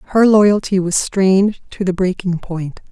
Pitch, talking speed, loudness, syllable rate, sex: 190 Hz, 165 wpm, -16 LUFS, 4.0 syllables/s, female